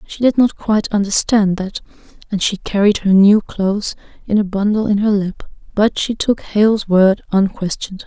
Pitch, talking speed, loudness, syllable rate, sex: 205 Hz, 180 wpm, -16 LUFS, 5.0 syllables/s, female